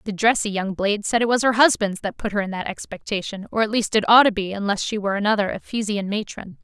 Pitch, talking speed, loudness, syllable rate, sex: 210 Hz, 255 wpm, -21 LUFS, 6.4 syllables/s, female